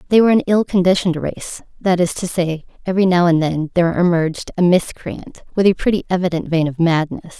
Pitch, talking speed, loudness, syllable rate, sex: 175 Hz, 195 wpm, -17 LUFS, 6.0 syllables/s, female